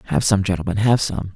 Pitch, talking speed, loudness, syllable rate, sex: 100 Hz, 220 wpm, -19 LUFS, 6.2 syllables/s, male